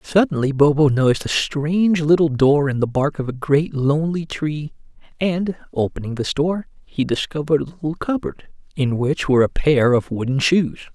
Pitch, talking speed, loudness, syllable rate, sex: 150 Hz, 175 wpm, -19 LUFS, 5.2 syllables/s, male